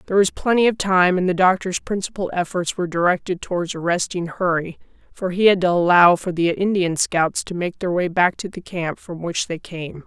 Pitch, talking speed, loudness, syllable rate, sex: 180 Hz, 215 wpm, -20 LUFS, 5.3 syllables/s, female